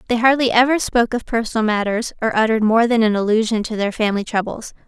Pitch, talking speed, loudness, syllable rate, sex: 225 Hz, 210 wpm, -18 LUFS, 6.7 syllables/s, female